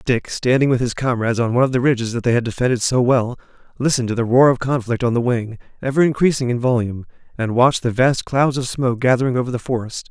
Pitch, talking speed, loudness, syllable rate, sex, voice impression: 125 Hz, 235 wpm, -18 LUFS, 6.7 syllables/s, male, masculine, adult-like, slightly fluent, slightly cool, sincere, calm